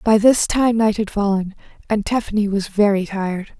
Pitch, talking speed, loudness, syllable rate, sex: 205 Hz, 185 wpm, -18 LUFS, 5.2 syllables/s, female